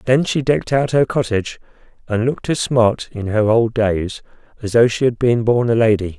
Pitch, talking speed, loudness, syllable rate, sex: 115 Hz, 215 wpm, -17 LUFS, 5.2 syllables/s, male